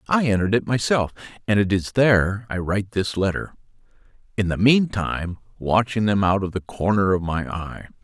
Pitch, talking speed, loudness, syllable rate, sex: 100 Hz, 185 wpm, -21 LUFS, 5.2 syllables/s, male